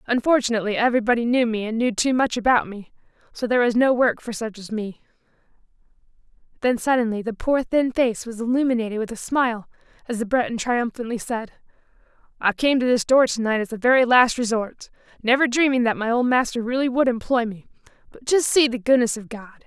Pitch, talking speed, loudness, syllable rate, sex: 235 Hz, 190 wpm, -21 LUFS, 6.0 syllables/s, female